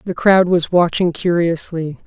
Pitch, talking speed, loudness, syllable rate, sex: 175 Hz, 145 wpm, -16 LUFS, 4.2 syllables/s, female